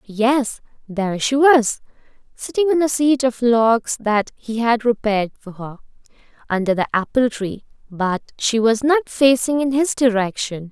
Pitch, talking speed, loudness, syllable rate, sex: 235 Hz, 155 wpm, -18 LUFS, 4.3 syllables/s, female